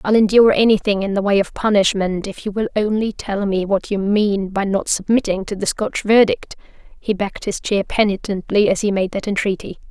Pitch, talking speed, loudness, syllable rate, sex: 200 Hz, 205 wpm, -18 LUFS, 5.5 syllables/s, female